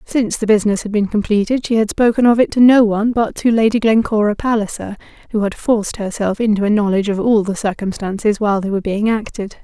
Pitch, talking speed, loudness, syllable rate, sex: 215 Hz, 220 wpm, -16 LUFS, 6.4 syllables/s, female